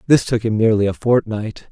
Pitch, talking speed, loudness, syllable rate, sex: 110 Hz, 210 wpm, -17 LUFS, 5.4 syllables/s, male